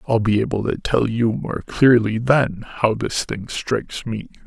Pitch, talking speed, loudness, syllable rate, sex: 115 Hz, 190 wpm, -20 LUFS, 4.4 syllables/s, male